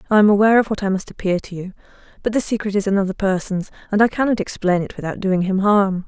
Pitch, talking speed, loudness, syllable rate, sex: 200 Hz, 245 wpm, -19 LUFS, 6.8 syllables/s, female